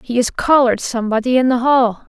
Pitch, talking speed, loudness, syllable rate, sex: 245 Hz, 190 wpm, -15 LUFS, 6.0 syllables/s, female